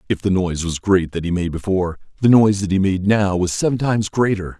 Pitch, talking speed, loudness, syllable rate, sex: 95 Hz, 250 wpm, -18 LUFS, 6.2 syllables/s, male